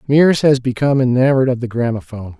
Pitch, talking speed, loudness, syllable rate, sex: 125 Hz, 175 wpm, -15 LUFS, 7.3 syllables/s, male